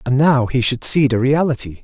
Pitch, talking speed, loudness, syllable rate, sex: 130 Hz, 230 wpm, -16 LUFS, 5.2 syllables/s, male